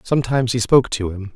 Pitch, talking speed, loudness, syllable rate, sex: 115 Hz, 220 wpm, -18 LUFS, 7.2 syllables/s, male